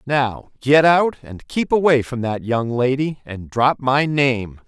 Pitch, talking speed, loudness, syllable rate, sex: 130 Hz, 165 wpm, -18 LUFS, 3.7 syllables/s, male